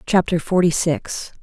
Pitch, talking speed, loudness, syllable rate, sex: 170 Hz, 125 wpm, -19 LUFS, 4.1 syllables/s, female